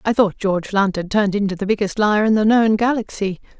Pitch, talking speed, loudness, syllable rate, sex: 205 Hz, 235 wpm, -18 LUFS, 6.1 syllables/s, female